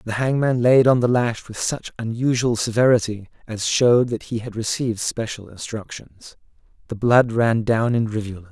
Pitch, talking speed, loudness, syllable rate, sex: 115 Hz, 170 wpm, -20 LUFS, 5.0 syllables/s, male